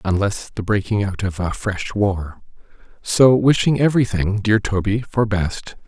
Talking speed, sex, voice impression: 155 wpm, male, masculine, adult-like, slightly thick, fluent, cool, sincere, slightly calm